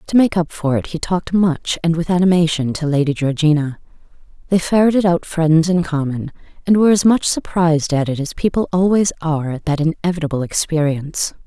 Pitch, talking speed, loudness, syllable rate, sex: 165 Hz, 185 wpm, -17 LUFS, 5.8 syllables/s, female